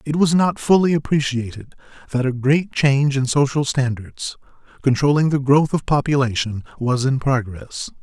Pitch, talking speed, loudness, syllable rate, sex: 135 Hz, 150 wpm, -19 LUFS, 4.8 syllables/s, male